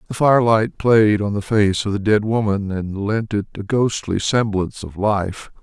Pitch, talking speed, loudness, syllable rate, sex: 105 Hz, 205 wpm, -19 LUFS, 4.3 syllables/s, male